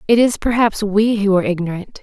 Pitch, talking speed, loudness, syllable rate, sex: 205 Hz, 205 wpm, -16 LUFS, 5.9 syllables/s, female